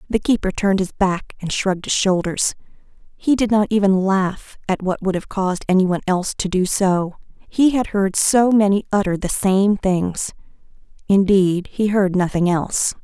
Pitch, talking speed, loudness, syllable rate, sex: 195 Hz, 175 wpm, -18 LUFS, 4.9 syllables/s, female